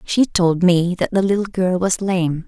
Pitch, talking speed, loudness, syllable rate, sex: 185 Hz, 220 wpm, -18 LUFS, 4.4 syllables/s, female